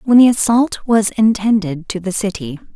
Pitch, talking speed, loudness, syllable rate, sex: 215 Hz, 175 wpm, -15 LUFS, 4.9 syllables/s, female